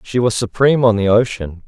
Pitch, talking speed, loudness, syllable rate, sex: 115 Hz, 215 wpm, -15 LUFS, 5.7 syllables/s, male